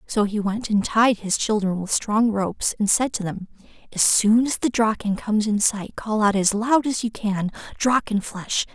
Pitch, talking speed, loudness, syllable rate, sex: 215 Hz, 205 wpm, -21 LUFS, 4.6 syllables/s, female